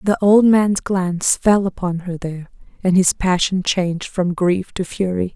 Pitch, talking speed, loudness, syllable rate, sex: 185 Hz, 180 wpm, -18 LUFS, 4.5 syllables/s, female